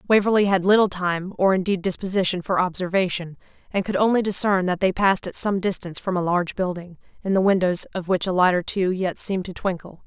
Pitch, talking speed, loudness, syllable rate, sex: 185 Hz, 215 wpm, -21 LUFS, 6.1 syllables/s, female